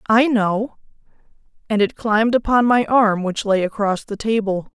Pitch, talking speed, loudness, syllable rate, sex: 215 Hz, 165 wpm, -18 LUFS, 4.6 syllables/s, female